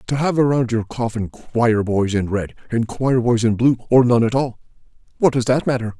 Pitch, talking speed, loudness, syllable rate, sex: 120 Hz, 190 wpm, -19 LUFS, 5.5 syllables/s, male